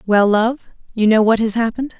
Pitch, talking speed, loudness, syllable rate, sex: 225 Hz, 180 wpm, -16 LUFS, 5.7 syllables/s, female